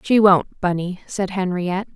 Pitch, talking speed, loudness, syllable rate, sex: 190 Hz, 155 wpm, -20 LUFS, 4.6 syllables/s, female